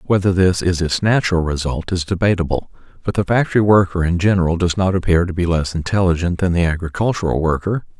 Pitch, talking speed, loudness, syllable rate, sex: 90 Hz, 190 wpm, -17 LUFS, 6.1 syllables/s, male